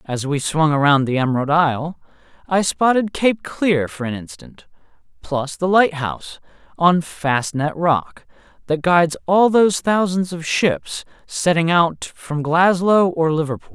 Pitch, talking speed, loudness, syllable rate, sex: 155 Hz, 145 wpm, -18 LUFS, 4.3 syllables/s, male